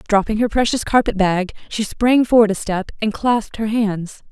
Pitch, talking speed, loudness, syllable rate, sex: 215 Hz, 195 wpm, -18 LUFS, 5.0 syllables/s, female